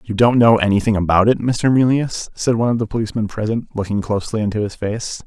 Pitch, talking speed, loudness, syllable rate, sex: 110 Hz, 215 wpm, -17 LUFS, 6.3 syllables/s, male